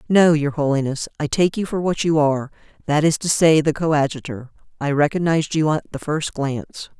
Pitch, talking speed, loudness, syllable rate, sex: 150 Hz, 195 wpm, -19 LUFS, 5.6 syllables/s, female